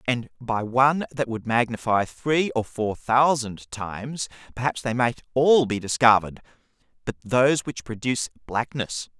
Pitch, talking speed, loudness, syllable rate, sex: 120 Hz, 145 wpm, -23 LUFS, 4.5 syllables/s, male